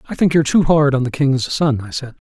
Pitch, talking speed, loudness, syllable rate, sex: 140 Hz, 290 wpm, -16 LUFS, 6.2 syllables/s, male